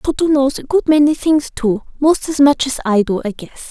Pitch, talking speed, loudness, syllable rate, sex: 275 Hz, 245 wpm, -15 LUFS, 5.3 syllables/s, female